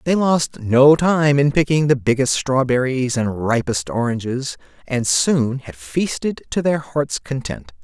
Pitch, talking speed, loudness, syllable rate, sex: 135 Hz, 155 wpm, -18 LUFS, 4.0 syllables/s, male